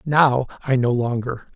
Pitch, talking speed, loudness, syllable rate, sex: 130 Hz, 155 wpm, -20 LUFS, 4.2 syllables/s, male